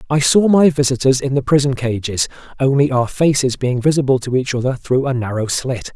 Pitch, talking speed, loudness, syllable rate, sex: 130 Hz, 200 wpm, -16 LUFS, 5.5 syllables/s, male